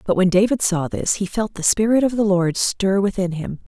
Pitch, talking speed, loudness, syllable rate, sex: 195 Hz, 240 wpm, -19 LUFS, 5.2 syllables/s, female